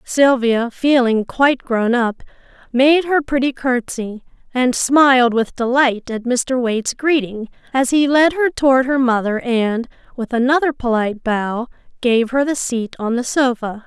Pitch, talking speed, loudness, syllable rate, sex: 250 Hz, 155 wpm, -17 LUFS, 4.3 syllables/s, female